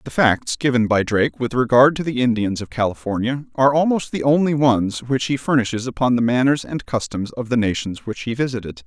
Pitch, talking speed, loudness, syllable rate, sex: 125 Hz, 210 wpm, -19 LUFS, 5.7 syllables/s, male